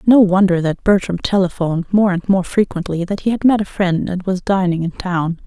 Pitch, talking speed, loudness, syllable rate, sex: 185 Hz, 220 wpm, -17 LUFS, 5.4 syllables/s, female